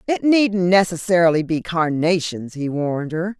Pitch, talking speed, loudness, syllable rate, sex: 175 Hz, 140 wpm, -19 LUFS, 4.6 syllables/s, female